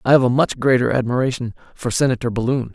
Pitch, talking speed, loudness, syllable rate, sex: 125 Hz, 195 wpm, -19 LUFS, 6.6 syllables/s, male